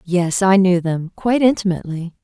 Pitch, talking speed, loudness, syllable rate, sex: 185 Hz, 135 wpm, -17 LUFS, 5.4 syllables/s, female